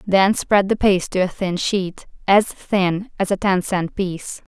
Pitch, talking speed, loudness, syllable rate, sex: 190 Hz, 200 wpm, -19 LUFS, 4.2 syllables/s, female